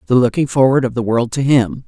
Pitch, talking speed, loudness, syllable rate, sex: 130 Hz, 255 wpm, -15 LUFS, 5.9 syllables/s, female